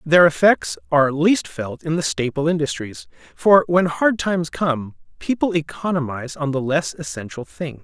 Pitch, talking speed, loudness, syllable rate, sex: 150 Hz, 160 wpm, -20 LUFS, 4.8 syllables/s, male